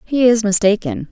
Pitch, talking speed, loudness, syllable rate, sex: 205 Hz, 160 wpm, -15 LUFS, 5.0 syllables/s, female